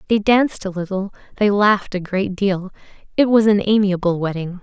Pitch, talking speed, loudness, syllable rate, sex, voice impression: 200 Hz, 180 wpm, -18 LUFS, 5.5 syllables/s, female, very feminine, adult-like, slightly clear, slightly calm, elegant